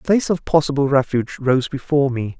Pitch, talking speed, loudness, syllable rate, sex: 140 Hz, 200 wpm, -19 LUFS, 6.4 syllables/s, male